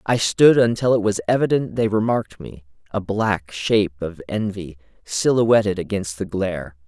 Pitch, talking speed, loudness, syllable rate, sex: 100 Hz, 155 wpm, -20 LUFS, 4.9 syllables/s, male